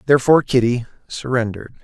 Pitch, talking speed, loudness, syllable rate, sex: 125 Hz, 100 wpm, -17 LUFS, 7.0 syllables/s, male